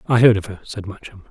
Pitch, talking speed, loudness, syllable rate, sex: 105 Hz, 275 wpm, -17 LUFS, 6.4 syllables/s, male